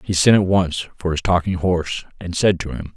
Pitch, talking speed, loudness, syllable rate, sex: 90 Hz, 245 wpm, -19 LUFS, 5.2 syllables/s, male